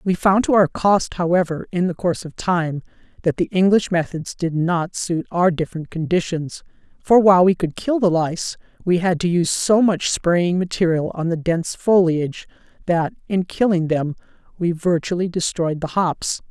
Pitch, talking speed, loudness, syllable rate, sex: 175 Hz, 180 wpm, -19 LUFS, 4.9 syllables/s, female